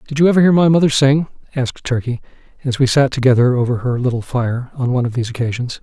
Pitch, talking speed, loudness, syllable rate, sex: 130 Hz, 225 wpm, -16 LUFS, 6.8 syllables/s, male